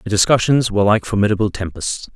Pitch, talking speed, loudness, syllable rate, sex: 105 Hz, 165 wpm, -17 LUFS, 6.2 syllables/s, male